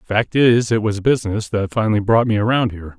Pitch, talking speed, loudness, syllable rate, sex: 110 Hz, 220 wpm, -17 LUFS, 5.8 syllables/s, male